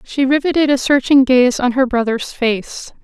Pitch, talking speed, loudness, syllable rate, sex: 260 Hz, 180 wpm, -15 LUFS, 4.6 syllables/s, female